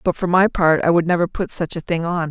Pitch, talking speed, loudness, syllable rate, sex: 170 Hz, 315 wpm, -18 LUFS, 5.9 syllables/s, female